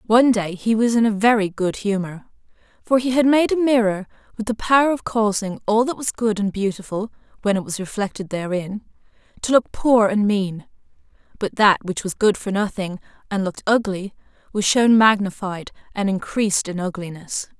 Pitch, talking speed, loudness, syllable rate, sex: 210 Hz, 180 wpm, -20 LUFS, 5.2 syllables/s, female